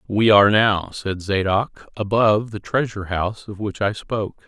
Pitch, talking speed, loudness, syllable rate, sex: 105 Hz, 175 wpm, -20 LUFS, 5.1 syllables/s, male